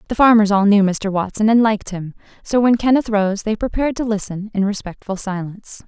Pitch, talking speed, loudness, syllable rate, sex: 210 Hz, 205 wpm, -17 LUFS, 5.8 syllables/s, female